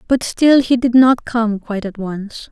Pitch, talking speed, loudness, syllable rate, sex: 230 Hz, 215 wpm, -15 LUFS, 4.3 syllables/s, female